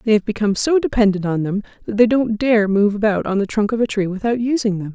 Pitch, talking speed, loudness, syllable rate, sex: 210 Hz, 265 wpm, -18 LUFS, 6.3 syllables/s, female